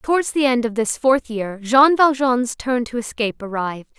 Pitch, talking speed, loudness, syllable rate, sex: 245 Hz, 195 wpm, -19 LUFS, 5.0 syllables/s, female